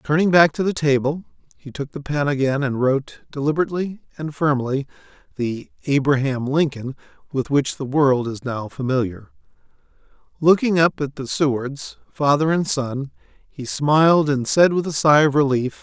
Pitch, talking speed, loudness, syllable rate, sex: 145 Hz, 160 wpm, -20 LUFS, 4.9 syllables/s, male